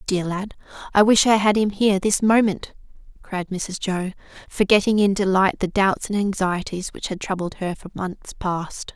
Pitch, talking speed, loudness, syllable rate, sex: 195 Hz, 180 wpm, -21 LUFS, 4.7 syllables/s, female